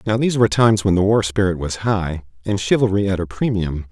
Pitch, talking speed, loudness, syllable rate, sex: 100 Hz, 230 wpm, -18 LUFS, 6.2 syllables/s, male